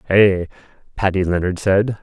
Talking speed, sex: 120 wpm, male